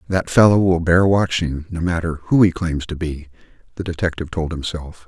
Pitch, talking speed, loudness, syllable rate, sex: 85 Hz, 190 wpm, -19 LUFS, 5.3 syllables/s, male